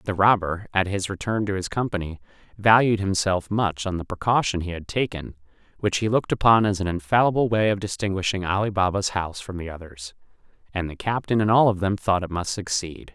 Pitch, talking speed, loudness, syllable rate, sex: 100 Hz, 200 wpm, -23 LUFS, 5.8 syllables/s, male